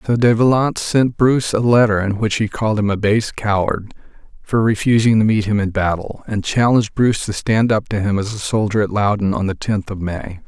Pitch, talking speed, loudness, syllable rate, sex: 105 Hz, 230 wpm, -17 LUFS, 5.5 syllables/s, male